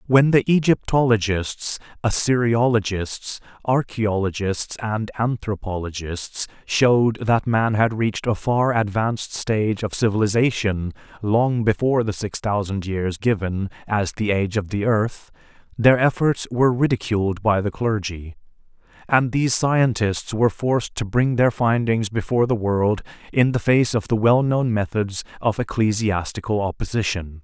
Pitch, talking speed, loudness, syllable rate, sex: 110 Hz, 135 wpm, -21 LUFS, 4.5 syllables/s, male